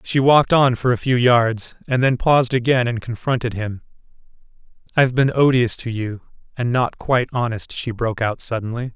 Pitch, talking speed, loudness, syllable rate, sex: 120 Hz, 175 wpm, -19 LUFS, 5.4 syllables/s, male